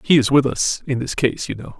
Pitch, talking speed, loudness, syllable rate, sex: 130 Hz, 300 wpm, -19 LUFS, 5.5 syllables/s, male